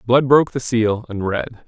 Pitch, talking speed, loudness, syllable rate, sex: 115 Hz, 215 wpm, -18 LUFS, 4.6 syllables/s, male